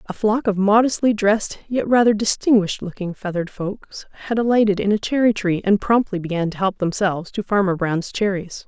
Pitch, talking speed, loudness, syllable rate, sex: 200 Hz, 185 wpm, -20 LUFS, 5.6 syllables/s, female